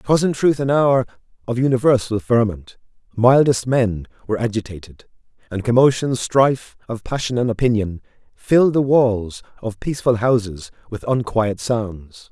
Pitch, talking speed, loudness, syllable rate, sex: 115 Hz, 135 wpm, -18 LUFS, 4.8 syllables/s, male